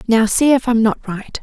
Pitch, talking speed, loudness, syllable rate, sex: 230 Hz, 250 wpm, -15 LUFS, 4.7 syllables/s, female